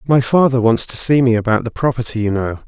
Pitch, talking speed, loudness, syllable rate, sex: 120 Hz, 245 wpm, -15 LUFS, 6.1 syllables/s, male